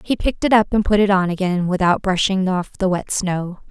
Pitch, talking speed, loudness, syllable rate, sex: 190 Hz, 245 wpm, -18 LUFS, 5.3 syllables/s, female